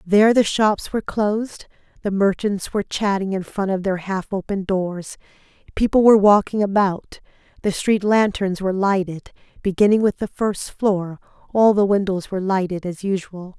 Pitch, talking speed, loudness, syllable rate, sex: 195 Hz, 165 wpm, -20 LUFS, 5.0 syllables/s, female